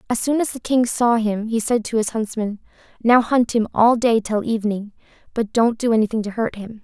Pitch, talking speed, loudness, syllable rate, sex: 225 Hz, 230 wpm, -20 LUFS, 5.4 syllables/s, female